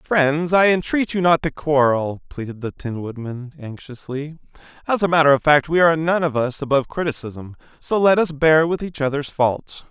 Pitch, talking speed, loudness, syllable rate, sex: 150 Hz, 195 wpm, -19 LUFS, 5.0 syllables/s, male